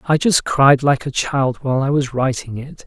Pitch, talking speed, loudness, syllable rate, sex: 135 Hz, 230 wpm, -17 LUFS, 4.7 syllables/s, male